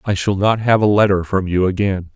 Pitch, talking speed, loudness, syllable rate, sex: 100 Hz, 250 wpm, -16 LUFS, 5.4 syllables/s, male